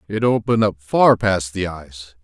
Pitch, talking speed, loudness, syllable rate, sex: 95 Hz, 190 wpm, -18 LUFS, 4.5 syllables/s, male